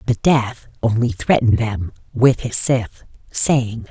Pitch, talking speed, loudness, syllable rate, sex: 115 Hz, 140 wpm, -18 LUFS, 4.1 syllables/s, female